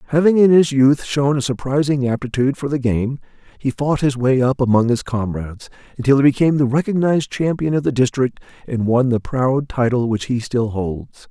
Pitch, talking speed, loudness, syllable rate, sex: 130 Hz, 195 wpm, -18 LUFS, 5.4 syllables/s, male